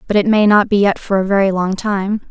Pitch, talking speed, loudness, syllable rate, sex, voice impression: 200 Hz, 285 wpm, -14 LUFS, 5.6 syllables/s, female, feminine, slightly adult-like, slightly fluent, refreshing, slightly friendly, slightly lively